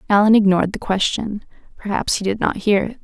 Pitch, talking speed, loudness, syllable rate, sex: 205 Hz, 180 wpm, -18 LUFS, 6.0 syllables/s, female